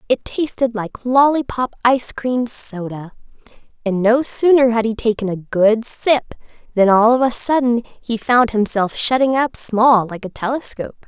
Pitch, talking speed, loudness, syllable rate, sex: 235 Hz, 160 wpm, -17 LUFS, 4.5 syllables/s, female